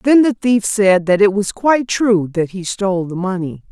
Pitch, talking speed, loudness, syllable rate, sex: 200 Hz, 225 wpm, -16 LUFS, 4.8 syllables/s, female